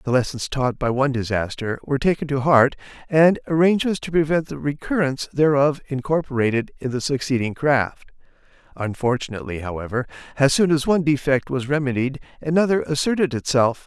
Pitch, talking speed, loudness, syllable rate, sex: 140 Hz, 145 wpm, -21 LUFS, 5.9 syllables/s, male